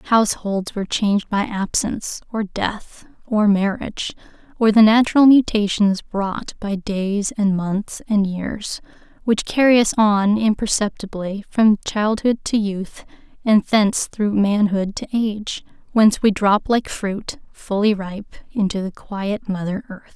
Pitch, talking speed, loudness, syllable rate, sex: 205 Hz, 140 wpm, -19 LUFS, 4.1 syllables/s, female